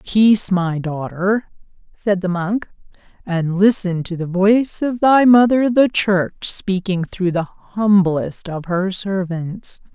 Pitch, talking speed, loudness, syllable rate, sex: 190 Hz, 140 wpm, -17 LUFS, 3.6 syllables/s, female